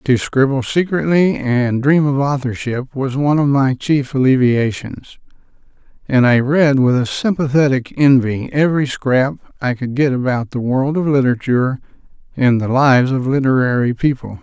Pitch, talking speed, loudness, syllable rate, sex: 135 Hz, 150 wpm, -15 LUFS, 4.9 syllables/s, male